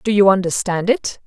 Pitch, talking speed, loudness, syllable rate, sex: 200 Hz, 190 wpm, -17 LUFS, 5.1 syllables/s, female